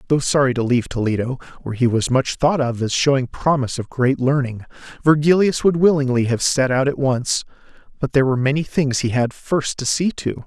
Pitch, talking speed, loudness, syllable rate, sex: 135 Hz, 205 wpm, -19 LUFS, 5.7 syllables/s, male